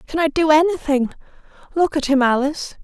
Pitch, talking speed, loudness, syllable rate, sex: 295 Hz, 170 wpm, -18 LUFS, 5.9 syllables/s, female